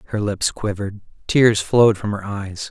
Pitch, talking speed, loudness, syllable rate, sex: 105 Hz, 180 wpm, -19 LUFS, 5.0 syllables/s, male